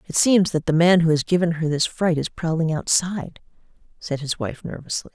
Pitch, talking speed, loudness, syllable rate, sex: 165 Hz, 210 wpm, -21 LUFS, 5.4 syllables/s, female